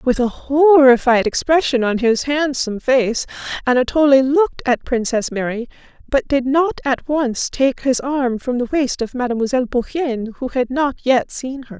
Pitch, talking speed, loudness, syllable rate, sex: 260 Hz, 170 wpm, -17 LUFS, 4.8 syllables/s, female